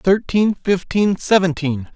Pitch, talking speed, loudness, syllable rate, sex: 180 Hz, 90 wpm, -18 LUFS, 3.7 syllables/s, male